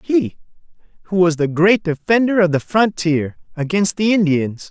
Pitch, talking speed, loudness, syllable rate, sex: 170 Hz, 155 wpm, -17 LUFS, 4.6 syllables/s, male